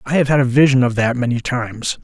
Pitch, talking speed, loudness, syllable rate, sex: 130 Hz, 265 wpm, -16 LUFS, 6.3 syllables/s, male